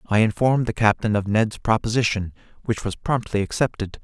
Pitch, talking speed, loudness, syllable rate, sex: 110 Hz, 165 wpm, -22 LUFS, 5.6 syllables/s, male